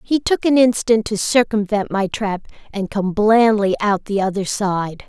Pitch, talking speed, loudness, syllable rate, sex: 210 Hz, 175 wpm, -18 LUFS, 4.3 syllables/s, female